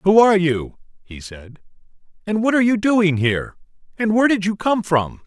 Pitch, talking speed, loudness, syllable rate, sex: 180 Hz, 195 wpm, -18 LUFS, 5.5 syllables/s, male